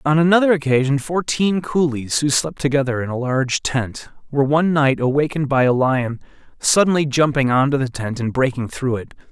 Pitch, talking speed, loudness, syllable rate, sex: 140 Hz, 185 wpm, -18 LUFS, 5.6 syllables/s, male